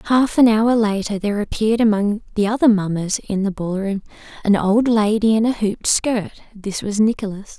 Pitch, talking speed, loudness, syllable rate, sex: 210 Hz, 175 wpm, -18 LUFS, 5.4 syllables/s, female